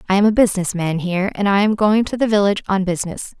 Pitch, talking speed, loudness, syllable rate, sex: 200 Hz, 265 wpm, -17 LUFS, 7.0 syllables/s, female